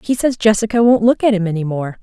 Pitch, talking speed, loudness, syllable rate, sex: 210 Hz, 265 wpm, -15 LUFS, 6.3 syllables/s, female